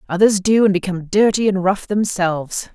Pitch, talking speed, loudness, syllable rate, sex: 195 Hz, 175 wpm, -17 LUFS, 5.5 syllables/s, female